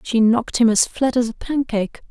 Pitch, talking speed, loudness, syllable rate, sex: 235 Hz, 230 wpm, -19 LUFS, 5.6 syllables/s, female